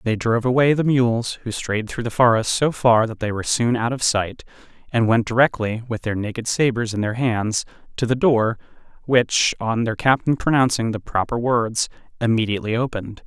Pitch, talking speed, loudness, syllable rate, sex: 115 Hz, 190 wpm, -20 LUFS, 5.2 syllables/s, male